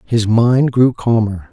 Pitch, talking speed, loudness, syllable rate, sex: 115 Hz, 160 wpm, -14 LUFS, 3.6 syllables/s, male